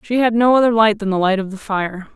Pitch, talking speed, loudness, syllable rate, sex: 210 Hz, 305 wpm, -16 LUFS, 6.0 syllables/s, female